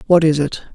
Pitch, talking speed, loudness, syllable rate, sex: 155 Hz, 240 wpm, -16 LUFS, 6.3 syllables/s, female